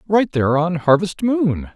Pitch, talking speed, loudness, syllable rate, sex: 170 Hz, 170 wpm, -18 LUFS, 4.4 syllables/s, male